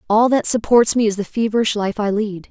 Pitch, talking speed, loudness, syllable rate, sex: 215 Hz, 240 wpm, -17 LUFS, 5.6 syllables/s, female